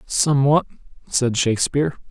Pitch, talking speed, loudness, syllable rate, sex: 135 Hz, 85 wpm, -19 LUFS, 5.5 syllables/s, male